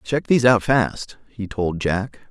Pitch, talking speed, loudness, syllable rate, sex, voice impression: 110 Hz, 180 wpm, -20 LUFS, 4.0 syllables/s, male, very masculine, very adult-like, very thick, slightly tensed, powerful, slightly dark, very soft, muffled, fluent, raspy, cool, intellectual, very refreshing, sincere, very calm, very mature, friendly, reassuring, very unique, slightly elegant, very wild, sweet, lively, kind, slightly modest